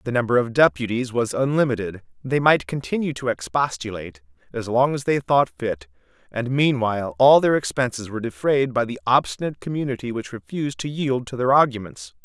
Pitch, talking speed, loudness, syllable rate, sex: 120 Hz, 170 wpm, -21 LUFS, 5.7 syllables/s, male